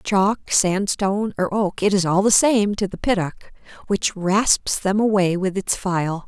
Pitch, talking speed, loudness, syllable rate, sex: 195 Hz, 180 wpm, -20 LUFS, 4.1 syllables/s, female